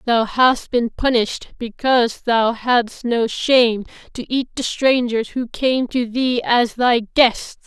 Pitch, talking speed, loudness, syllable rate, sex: 240 Hz, 155 wpm, -18 LUFS, 3.8 syllables/s, female